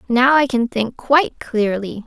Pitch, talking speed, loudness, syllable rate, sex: 245 Hz, 175 wpm, -17 LUFS, 4.3 syllables/s, female